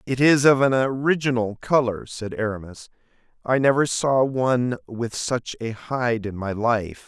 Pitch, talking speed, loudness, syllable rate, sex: 120 Hz, 160 wpm, -22 LUFS, 4.4 syllables/s, male